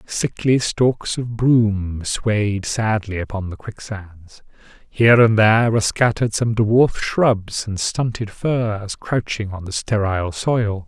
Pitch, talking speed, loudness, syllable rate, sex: 110 Hz, 140 wpm, -19 LUFS, 3.7 syllables/s, male